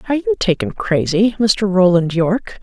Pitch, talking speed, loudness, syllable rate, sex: 190 Hz, 160 wpm, -16 LUFS, 5.1 syllables/s, female